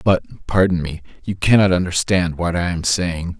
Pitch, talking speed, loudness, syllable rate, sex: 90 Hz, 175 wpm, -18 LUFS, 4.6 syllables/s, male